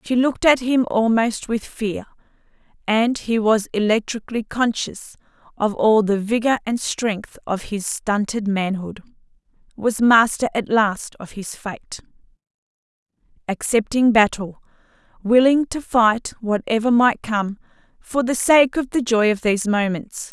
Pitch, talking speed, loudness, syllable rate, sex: 225 Hz, 135 wpm, -19 LUFS, 4.2 syllables/s, female